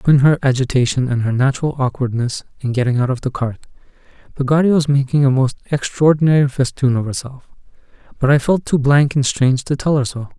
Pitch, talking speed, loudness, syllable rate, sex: 135 Hz, 190 wpm, -16 LUFS, 6.1 syllables/s, male